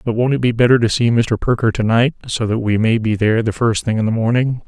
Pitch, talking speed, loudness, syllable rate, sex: 115 Hz, 295 wpm, -16 LUFS, 6.1 syllables/s, male